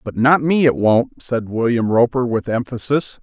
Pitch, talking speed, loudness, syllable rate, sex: 125 Hz, 185 wpm, -17 LUFS, 4.5 syllables/s, male